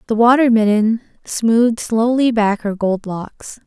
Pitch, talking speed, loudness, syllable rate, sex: 225 Hz, 145 wpm, -16 LUFS, 4.1 syllables/s, female